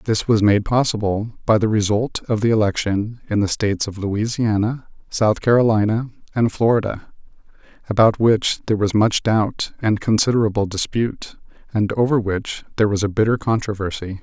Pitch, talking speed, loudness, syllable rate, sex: 110 Hz, 150 wpm, -19 LUFS, 5.2 syllables/s, male